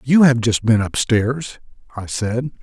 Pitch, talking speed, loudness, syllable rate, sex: 120 Hz, 185 wpm, -18 LUFS, 3.8 syllables/s, male